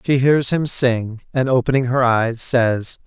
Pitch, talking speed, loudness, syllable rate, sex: 125 Hz, 175 wpm, -17 LUFS, 3.9 syllables/s, male